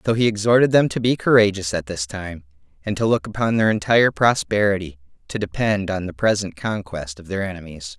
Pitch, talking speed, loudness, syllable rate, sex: 100 Hz, 195 wpm, -20 LUFS, 5.7 syllables/s, male